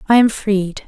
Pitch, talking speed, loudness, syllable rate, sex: 205 Hz, 205 wpm, -16 LUFS, 4.5 syllables/s, female